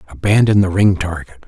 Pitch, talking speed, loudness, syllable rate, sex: 90 Hz, 160 wpm, -15 LUFS, 5.6 syllables/s, male